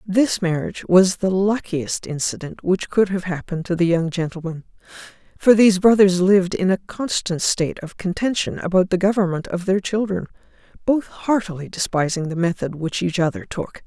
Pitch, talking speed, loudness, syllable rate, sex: 185 Hz, 170 wpm, -20 LUFS, 5.2 syllables/s, female